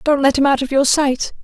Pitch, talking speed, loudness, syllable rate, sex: 275 Hz, 290 wpm, -15 LUFS, 5.5 syllables/s, female